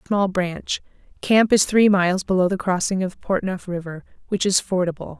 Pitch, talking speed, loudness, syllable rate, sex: 190 Hz, 175 wpm, -21 LUFS, 5.0 syllables/s, female